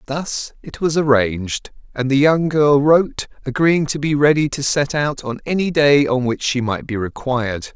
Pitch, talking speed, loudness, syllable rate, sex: 140 Hz, 195 wpm, -18 LUFS, 4.7 syllables/s, male